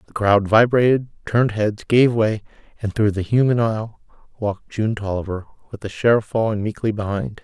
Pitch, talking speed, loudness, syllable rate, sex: 110 Hz, 170 wpm, -20 LUFS, 5.6 syllables/s, male